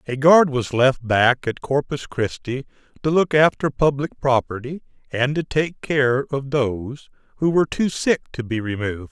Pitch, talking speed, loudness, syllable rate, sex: 135 Hz, 170 wpm, -20 LUFS, 4.8 syllables/s, male